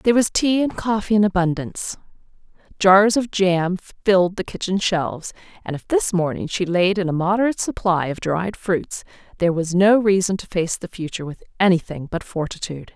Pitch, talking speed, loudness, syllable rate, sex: 185 Hz, 180 wpm, -20 LUFS, 5.6 syllables/s, female